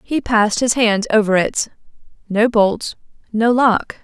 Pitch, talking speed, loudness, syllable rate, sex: 220 Hz, 150 wpm, -16 LUFS, 4.0 syllables/s, female